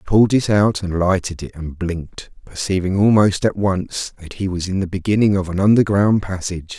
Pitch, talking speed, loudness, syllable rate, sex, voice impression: 95 Hz, 205 wpm, -18 LUFS, 5.5 syllables/s, male, masculine, middle-aged, thick, tensed, slightly soft, cool, calm, friendly, reassuring, wild, slightly kind, slightly modest